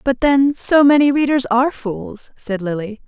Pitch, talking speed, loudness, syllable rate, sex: 255 Hz, 175 wpm, -16 LUFS, 4.1 syllables/s, female